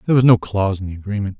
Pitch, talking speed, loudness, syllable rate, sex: 100 Hz, 300 wpm, -18 LUFS, 8.8 syllables/s, male